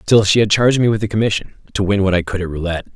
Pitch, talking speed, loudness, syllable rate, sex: 100 Hz, 285 wpm, -16 LUFS, 7.4 syllables/s, male